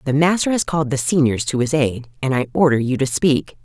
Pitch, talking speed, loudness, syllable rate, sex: 140 Hz, 245 wpm, -18 LUFS, 5.8 syllables/s, female